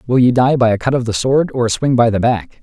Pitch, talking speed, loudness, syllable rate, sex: 120 Hz, 345 wpm, -14 LUFS, 6.0 syllables/s, male